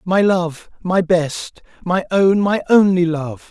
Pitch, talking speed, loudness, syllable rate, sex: 180 Hz, 155 wpm, -16 LUFS, 3.4 syllables/s, male